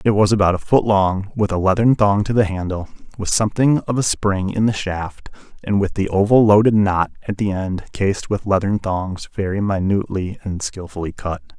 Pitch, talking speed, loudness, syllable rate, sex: 100 Hz, 200 wpm, -19 LUFS, 5.2 syllables/s, male